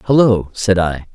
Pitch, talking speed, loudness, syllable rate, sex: 100 Hz, 155 wpm, -15 LUFS, 4.5 syllables/s, male